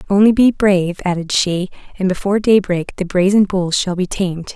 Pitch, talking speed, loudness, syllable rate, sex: 190 Hz, 185 wpm, -16 LUFS, 5.6 syllables/s, female